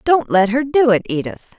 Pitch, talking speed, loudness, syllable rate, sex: 230 Hz, 225 wpm, -16 LUFS, 5.2 syllables/s, female